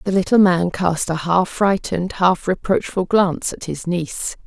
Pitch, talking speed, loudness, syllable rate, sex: 180 Hz, 175 wpm, -19 LUFS, 4.7 syllables/s, female